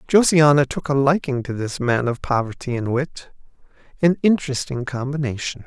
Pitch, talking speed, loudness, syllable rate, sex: 140 Hz, 150 wpm, -20 LUFS, 5.2 syllables/s, male